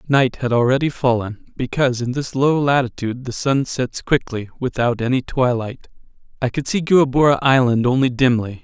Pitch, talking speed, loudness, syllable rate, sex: 130 Hz, 160 wpm, -18 LUFS, 5.2 syllables/s, male